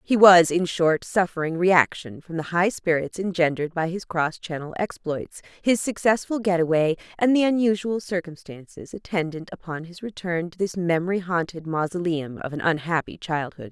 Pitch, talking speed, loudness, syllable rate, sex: 175 Hz, 160 wpm, -23 LUFS, 5.0 syllables/s, female